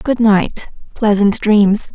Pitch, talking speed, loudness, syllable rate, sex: 210 Hz, 125 wpm, -13 LUFS, 3.0 syllables/s, female